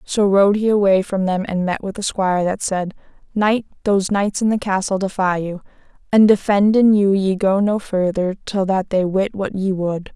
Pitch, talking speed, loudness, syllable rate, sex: 195 Hz, 205 wpm, -18 LUFS, 4.8 syllables/s, female